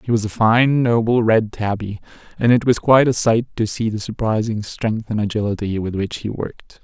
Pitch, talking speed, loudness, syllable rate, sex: 110 Hz, 210 wpm, -18 LUFS, 5.3 syllables/s, male